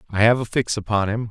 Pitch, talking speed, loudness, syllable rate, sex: 110 Hz, 275 wpm, -20 LUFS, 6.3 syllables/s, male